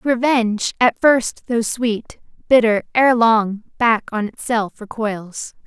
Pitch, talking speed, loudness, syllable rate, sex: 230 Hz, 125 wpm, -18 LUFS, 3.5 syllables/s, female